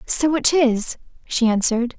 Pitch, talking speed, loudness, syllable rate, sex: 255 Hz, 150 wpm, -19 LUFS, 4.4 syllables/s, female